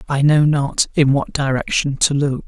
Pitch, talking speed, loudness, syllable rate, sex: 140 Hz, 195 wpm, -17 LUFS, 4.5 syllables/s, male